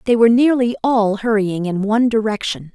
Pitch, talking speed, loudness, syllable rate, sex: 220 Hz, 175 wpm, -16 LUFS, 5.5 syllables/s, female